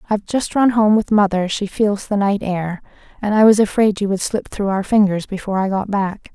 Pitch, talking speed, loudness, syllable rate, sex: 200 Hz, 220 wpm, -17 LUFS, 5.4 syllables/s, female